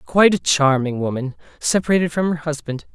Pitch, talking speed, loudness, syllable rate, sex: 150 Hz, 165 wpm, -19 LUFS, 5.8 syllables/s, male